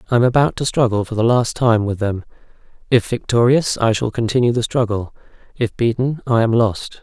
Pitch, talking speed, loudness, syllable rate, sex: 115 Hz, 195 wpm, -17 LUFS, 5.4 syllables/s, male